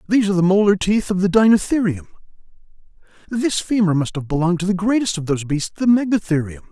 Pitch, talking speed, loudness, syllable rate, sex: 190 Hz, 190 wpm, -18 LUFS, 6.6 syllables/s, male